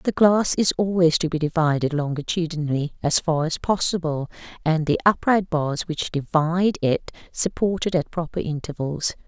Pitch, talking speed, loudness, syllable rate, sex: 165 Hz, 150 wpm, -22 LUFS, 4.9 syllables/s, female